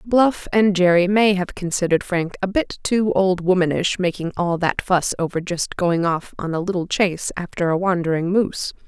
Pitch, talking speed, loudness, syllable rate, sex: 180 Hz, 190 wpm, -20 LUFS, 5.0 syllables/s, female